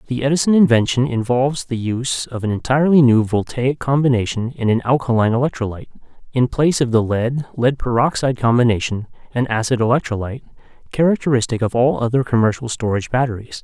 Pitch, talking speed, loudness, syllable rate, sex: 125 Hz, 150 wpm, -18 LUFS, 6.4 syllables/s, male